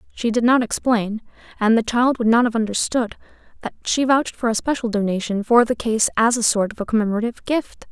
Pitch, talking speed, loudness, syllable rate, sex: 230 Hz, 205 wpm, -19 LUFS, 5.9 syllables/s, female